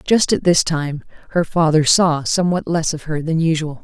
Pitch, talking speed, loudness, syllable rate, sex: 160 Hz, 205 wpm, -17 LUFS, 5.0 syllables/s, female